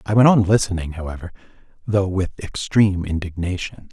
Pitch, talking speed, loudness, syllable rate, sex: 95 Hz, 140 wpm, -20 LUFS, 5.7 syllables/s, male